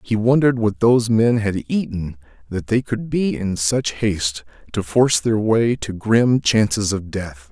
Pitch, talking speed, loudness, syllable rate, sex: 105 Hz, 185 wpm, -19 LUFS, 4.4 syllables/s, male